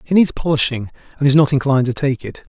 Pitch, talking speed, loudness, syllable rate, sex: 140 Hz, 235 wpm, -17 LUFS, 6.6 syllables/s, male